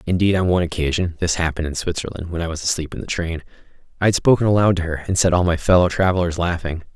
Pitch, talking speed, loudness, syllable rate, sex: 85 Hz, 240 wpm, -19 LUFS, 4.9 syllables/s, male